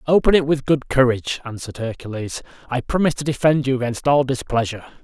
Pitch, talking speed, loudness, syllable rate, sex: 130 Hz, 180 wpm, -20 LUFS, 6.6 syllables/s, male